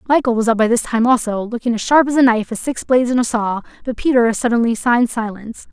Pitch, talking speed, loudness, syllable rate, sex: 235 Hz, 250 wpm, -16 LUFS, 6.6 syllables/s, female